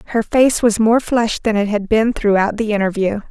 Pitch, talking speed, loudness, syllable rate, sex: 215 Hz, 220 wpm, -16 LUFS, 5.4 syllables/s, female